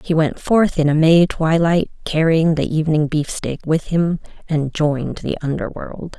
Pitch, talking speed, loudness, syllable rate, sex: 160 Hz, 165 wpm, -18 LUFS, 4.5 syllables/s, female